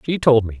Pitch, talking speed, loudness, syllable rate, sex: 125 Hz, 300 wpm, -16 LUFS, 6.4 syllables/s, male